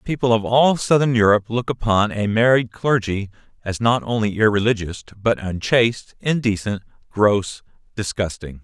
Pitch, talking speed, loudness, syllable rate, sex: 110 Hz, 140 wpm, -19 LUFS, 5.0 syllables/s, male